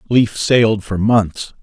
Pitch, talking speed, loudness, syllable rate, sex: 105 Hz, 150 wpm, -15 LUFS, 3.7 syllables/s, male